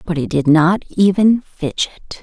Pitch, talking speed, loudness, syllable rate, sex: 175 Hz, 160 wpm, -16 LUFS, 3.9 syllables/s, female